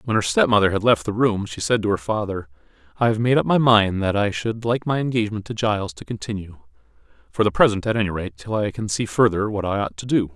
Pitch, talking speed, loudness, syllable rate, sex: 105 Hz, 260 wpm, -21 LUFS, 6.2 syllables/s, male